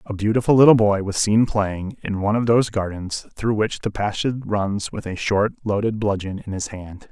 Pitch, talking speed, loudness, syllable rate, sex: 105 Hz, 210 wpm, -21 LUFS, 5.3 syllables/s, male